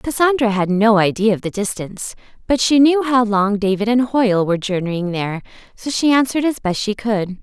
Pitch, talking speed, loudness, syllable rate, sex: 220 Hz, 200 wpm, -17 LUFS, 5.5 syllables/s, female